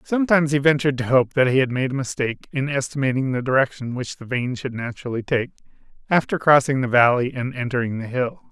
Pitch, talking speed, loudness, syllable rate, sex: 130 Hz, 205 wpm, -21 LUFS, 6.4 syllables/s, male